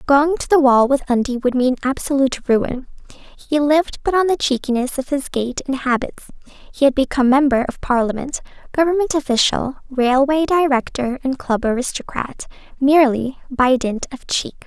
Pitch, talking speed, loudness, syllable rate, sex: 270 Hz, 160 wpm, -18 LUFS, 5.3 syllables/s, female